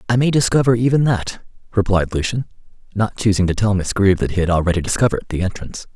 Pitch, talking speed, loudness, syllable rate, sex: 105 Hz, 200 wpm, -18 LUFS, 6.7 syllables/s, male